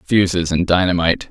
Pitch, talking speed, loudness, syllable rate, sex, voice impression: 90 Hz, 140 wpm, -16 LUFS, 5.5 syllables/s, male, very masculine, very adult-like, middle-aged, very thick, slightly relaxed, slightly powerful, slightly dark, hard, very clear, slightly fluent, very cool, intellectual, very sincere, very calm, friendly, very reassuring, slightly unique, elegant, slightly wild, slightly lively, slightly kind, slightly modest